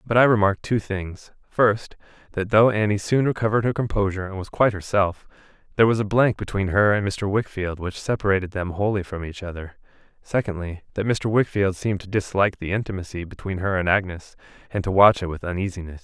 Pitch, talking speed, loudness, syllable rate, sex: 100 Hz, 195 wpm, -22 LUFS, 6.1 syllables/s, male